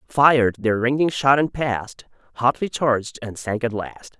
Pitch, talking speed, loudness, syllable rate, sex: 125 Hz, 170 wpm, -20 LUFS, 4.7 syllables/s, male